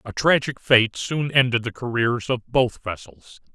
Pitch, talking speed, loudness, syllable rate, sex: 120 Hz, 170 wpm, -21 LUFS, 4.2 syllables/s, male